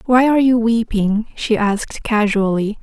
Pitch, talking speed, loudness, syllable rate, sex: 220 Hz, 150 wpm, -17 LUFS, 4.6 syllables/s, female